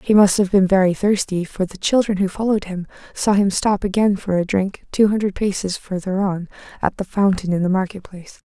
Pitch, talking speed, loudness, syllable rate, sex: 195 Hz, 220 wpm, -19 LUFS, 5.6 syllables/s, female